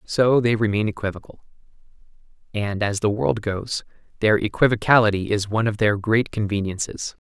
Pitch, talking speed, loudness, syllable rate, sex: 105 Hz, 140 wpm, -21 LUFS, 5.3 syllables/s, male